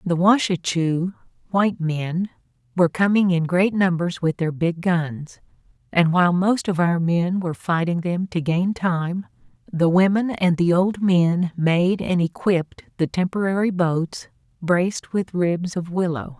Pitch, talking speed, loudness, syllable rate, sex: 175 Hz, 155 wpm, -21 LUFS, 4.3 syllables/s, female